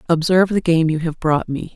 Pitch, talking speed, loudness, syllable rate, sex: 165 Hz, 240 wpm, -18 LUFS, 5.7 syllables/s, female